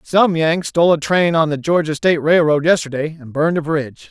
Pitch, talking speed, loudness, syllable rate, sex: 160 Hz, 220 wpm, -16 LUFS, 5.8 syllables/s, male